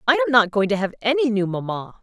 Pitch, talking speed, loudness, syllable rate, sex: 215 Hz, 265 wpm, -20 LUFS, 6.6 syllables/s, female